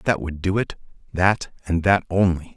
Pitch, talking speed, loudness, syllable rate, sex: 90 Hz, 190 wpm, -22 LUFS, 4.6 syllables/s, male